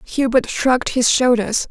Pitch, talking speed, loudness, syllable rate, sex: 245 Hz, 140 wpm, -16 LUFS, 4.4 syllables/s, female